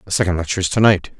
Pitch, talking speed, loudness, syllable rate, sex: 95 Hz, 250 wpm, -17 LUFS, 7.8 syllables/s, male